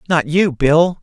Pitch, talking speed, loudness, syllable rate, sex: 160 Hz, 175 wpm, -15 LUFS, 3.7 syllables/s, male